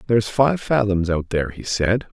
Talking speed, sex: 190 wpm, male